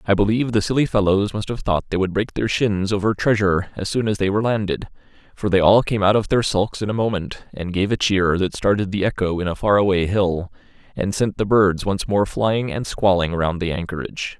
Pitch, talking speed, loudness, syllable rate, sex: 100 Hz, 235 wpm, -20 LUFS, 5.6 syllables/s, male